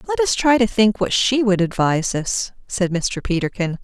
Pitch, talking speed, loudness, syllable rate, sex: 210 Hz, 205 wpm, -19 LUFS, 4.8 syllables/s, female